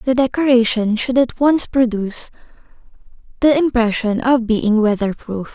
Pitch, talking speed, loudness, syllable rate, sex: 240 Hz, 130 wpm, -16 LUFS, 4.6 syllables/s, female